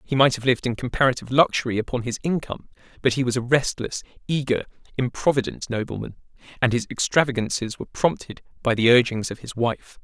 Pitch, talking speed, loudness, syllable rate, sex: 125 Hz, 175 wpm, -23 LUFS, 6.4 syllables/s, male